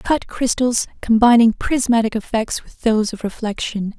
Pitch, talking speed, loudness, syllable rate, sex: 230 Hz, 135 wpm, -18 LUFS, 4.7 syllables/s, female